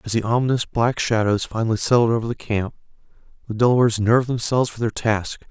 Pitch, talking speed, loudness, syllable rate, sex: 115 Hz, 185 wpm, -20 LUFS, 6.6 syllables/s, male